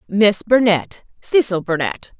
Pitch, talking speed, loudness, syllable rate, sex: 200 Hz, 80 wpm, -17 LUFS, 3.9 syllables/s, female